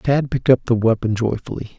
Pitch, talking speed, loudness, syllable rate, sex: 120 Hz, 200 wpm, -18 LUFS, 5.9 syllables/s, male